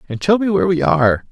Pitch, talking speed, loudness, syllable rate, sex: 155 Hz, 275 wpm, -15 LUFS, 7.1 syllables/s, male